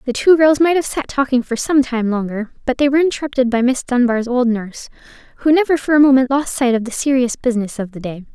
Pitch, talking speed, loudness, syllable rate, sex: 255 Hz, 245 wpm, -16 LUFS, 6.3 syllables/s, female